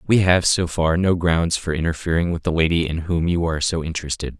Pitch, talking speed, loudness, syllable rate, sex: 85 Hz, 230 wpm, -20 LUFS, 5.9 syllables/s, male